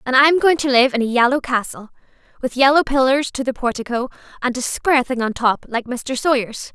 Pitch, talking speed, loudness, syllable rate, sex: 255 Hz, 215 wpm, -18 LUFS, 5.6 syllables/s, female